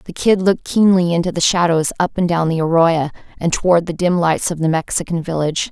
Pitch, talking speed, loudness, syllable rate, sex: 170 Hz, 220 wpm, -16 LUFS, 6.0 syllables/s, female